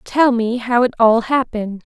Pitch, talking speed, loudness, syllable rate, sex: 235 Hz, 185 wpm, -16 LUFS, 4.8 syllables/s, female